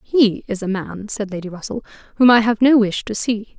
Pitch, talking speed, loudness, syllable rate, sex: 215 Hz, 235 wpm, -18 LUFS, 5.1 syllables/s, female